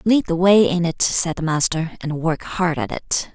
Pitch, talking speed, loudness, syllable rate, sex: 175 Hz, 235 wpm, -19 LUFS, 4.4 syllables/s, female